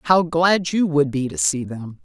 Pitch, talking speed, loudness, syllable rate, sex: 145 Hz, 235 wpm, -19 LUFS, 4.0 syllables/s, female